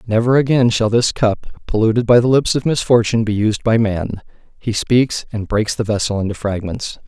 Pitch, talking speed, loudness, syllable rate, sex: 115 Hz, 195 wpm, -16 LUFS, 5.4 syllables/s, male